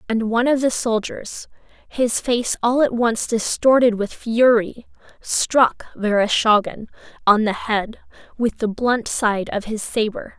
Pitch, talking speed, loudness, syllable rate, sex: 225 Hz, 145 wpm, -19 LUFS, 4.0 syllables/s, female